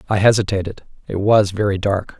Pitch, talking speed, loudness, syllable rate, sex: 100 Hz, 165 wpm, -18 LUFS, 5.7 syllables/s, male